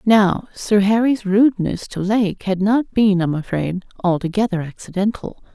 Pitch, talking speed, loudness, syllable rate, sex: 200 Hz, 150 wpm, -18 LUFS, 4.7 syllables/s, female